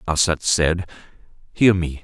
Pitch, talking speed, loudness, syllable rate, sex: 85 Hz, 120 wpm, -19 LUFS, 4.2 syllables/s, male